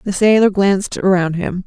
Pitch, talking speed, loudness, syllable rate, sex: 190 Hz, 180 wpm, -15 LUFS, 5.2 syllables/s, female